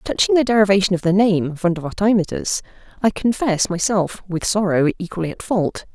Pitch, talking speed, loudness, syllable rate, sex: 195 Hz, 150 wpm, -19 LUFS, 5.5 syllables/s, female